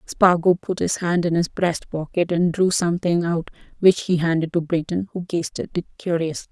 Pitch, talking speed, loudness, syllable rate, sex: 170 Hz, 205 wpm, -21 LUFS, 5.1 syllables/s, female